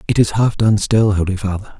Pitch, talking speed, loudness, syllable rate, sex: 100 Hz, 235 wpm, -16 LUFS, 5.6 syllables/s, male